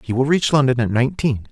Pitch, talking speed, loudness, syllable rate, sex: 130 Hz, 240 wpm, -18 LUFS, 6.4 syllables/s, male